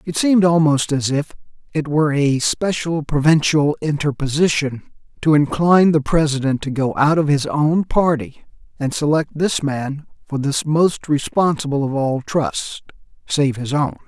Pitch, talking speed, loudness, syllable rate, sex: 150 Hz, 155 wpm, -18 LUFS, 4.6 syllables/s, male